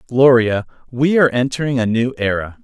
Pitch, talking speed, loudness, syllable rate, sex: 125 Hz, 160 wpm, -16 LUFS, 5.4 syllables/s, male